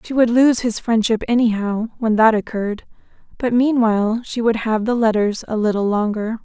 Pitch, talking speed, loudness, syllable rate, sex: 225 Hz, 175 wpm, -18 LUFS, 5.2 syllables/s, female